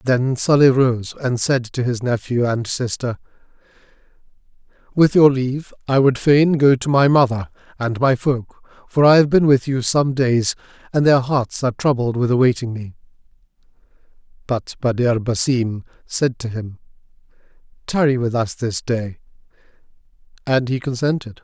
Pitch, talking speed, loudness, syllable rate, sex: 125 Hz, 150 wpm, -18 LUFS, 4.6 syllables/s, male